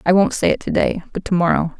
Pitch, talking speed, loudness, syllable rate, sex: 175 Hz, 300 wpm, -18 LUFS, 6.4 syllables/s, female